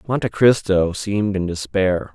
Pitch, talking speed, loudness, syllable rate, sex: 100 Hz, 140 wpm, -19 LUFS, 4.6 syllables/s, male